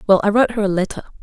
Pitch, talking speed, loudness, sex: 205 Hz, 295 wpm, -17 LUFS, female